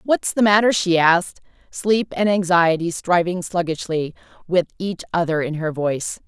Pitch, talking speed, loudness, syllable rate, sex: 175 Hz, 155 wpm, -19 LUFS, 4.8 syllables/s, female